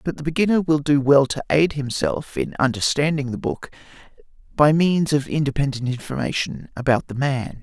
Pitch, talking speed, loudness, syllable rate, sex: 140 Hz, 165 wpm, -21 LUFS, 5.2 syllables/s, male